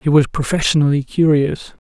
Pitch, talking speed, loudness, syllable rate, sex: 150 Hz, 130 wpm, -16 LUFS, 5.4 syllables/s, male